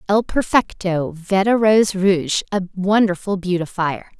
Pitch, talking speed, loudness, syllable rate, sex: 190 Hz, 115 wpm, -18 LUFS, 4.3 syllables/s, female